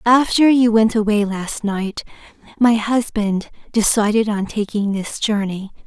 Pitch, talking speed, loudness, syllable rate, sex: 215 Hz, 135 wpm, -18 LUFS, 4.1 syllables/s, female